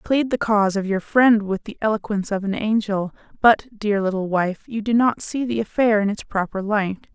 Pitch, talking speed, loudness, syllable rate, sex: 210 Hz, 225 wpm, -21 LUFS, 5.3 syllables/s, female